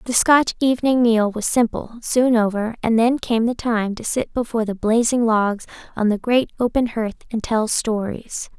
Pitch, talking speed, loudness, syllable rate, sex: 230 Hz, 190 wpm, -19 LUFS, 4.7 syllables/s, female